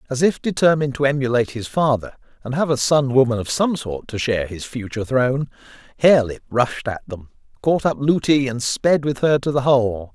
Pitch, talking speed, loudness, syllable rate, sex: 130 Hz, 200 wpm, -19 LUFS, 5.7 syllables/s, male